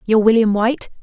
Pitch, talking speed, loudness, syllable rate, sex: 220 Hz, 175 wpm, -15 LUFS, 7.4 syllables/s, female